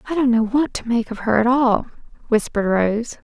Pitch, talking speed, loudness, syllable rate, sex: 235 Hz, 220 wpm, -19 LUFS, 5.3 syllables/s, female